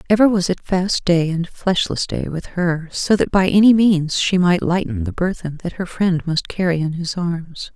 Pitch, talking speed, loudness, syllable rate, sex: 175 Hz, 215 wpm, -18 LUFS, 4.5 syllables/s, female